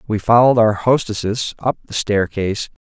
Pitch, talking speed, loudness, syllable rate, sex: 110 Hz, 145 wpm, -17 LUFS, 5.4 syllables/s, male